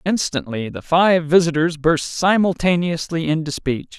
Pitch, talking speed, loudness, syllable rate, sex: 165 Hz, 120 wpm, -18 LUFS, 4.4 syllables/s, male